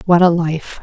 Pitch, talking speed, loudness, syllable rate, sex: 170 Hz, 220 wpm, -15 LUFS, 4.4 syllables/s, female